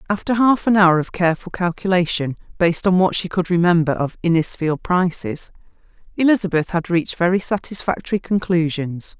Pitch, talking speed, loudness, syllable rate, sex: 175 Hz, 145 wpm, -19 LUFS, 5.6 syllables/s, female